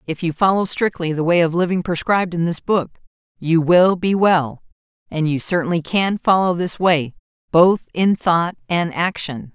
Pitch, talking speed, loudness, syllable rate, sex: 175 Hz, 175 wpm, -18 LUFS, 4.7 syllables/s, female